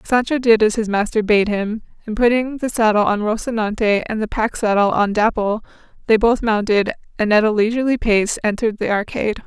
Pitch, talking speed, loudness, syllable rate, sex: 220 Hz, 190 wpm, -18 LUFS, 5.7 syllables/s, female